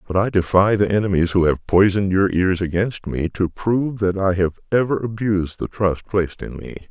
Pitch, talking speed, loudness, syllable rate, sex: 95 Hz, 210 wpm, -19 LUFS, 5.4 syllables/s, male